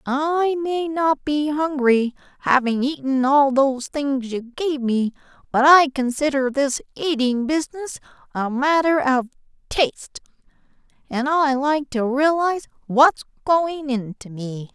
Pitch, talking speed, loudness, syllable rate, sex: 275 Hz, 130 wpm, -20 LUFS, 4.1 syllables/s, female